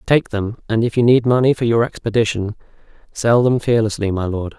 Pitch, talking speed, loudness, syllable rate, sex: 115 Hz, 195 wpm, -17 LUFS, 5.5 syllables/s, male